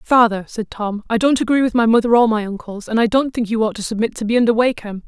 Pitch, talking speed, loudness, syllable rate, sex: 225 Hz, 285 wpm, -17 LUFS, 6.5 syllables/s, female